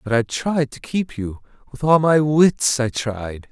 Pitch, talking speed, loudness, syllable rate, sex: 135 Hz, 205 wpm, -19 LUFS, 3.9 syllables/s, male